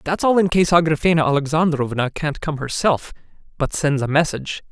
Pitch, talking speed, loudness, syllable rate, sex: 155 Hz, 165 wpm, -19 LUFS, 5.7 syllables/s, male